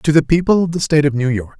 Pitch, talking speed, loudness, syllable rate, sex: 150 Hz, 340 wpm, -15 LUFS, 7.1 syllables/s, male